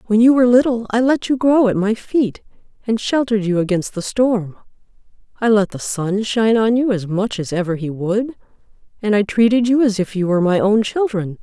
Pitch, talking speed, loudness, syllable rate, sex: 215 Hz, 215 wpm, -17 LUFS, 5.5 syllables/s, female